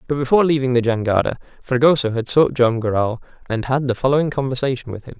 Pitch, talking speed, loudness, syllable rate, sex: 130 Hz, 195 wpm, -18 LUFS, 6.7 syllables/s, male